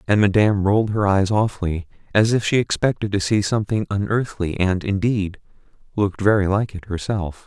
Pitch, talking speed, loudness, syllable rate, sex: 100 Hz, 170 wpm, -20 LUFS, 5.6 syllables/s, male